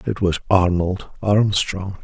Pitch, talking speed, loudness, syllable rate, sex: 95 Hz, 120 wpm, -19 LUFS, 3.6 syllables/s, male